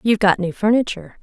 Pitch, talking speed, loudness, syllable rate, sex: 200 Hz, 195 wpm, -18 LUFS, 7.1 syllables/s, female